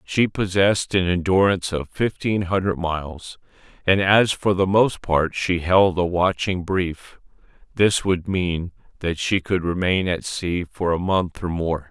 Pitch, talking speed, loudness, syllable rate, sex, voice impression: 90 Hz, 165 wpm, -21 LUFS, 4.1 syllables/s, male, very masculine, very adult-like, very middle-aged, very thick, very tensed, very powerful, slightly dark, slightly hard, slightly muffled, fluent, slightly raspy, very cool, very intellectual, very sincere, very calm, very mature, friendly, very reassuring, very unique, elegant, very wild, sweet, slightly lively, kind, slightly intense, slightly modest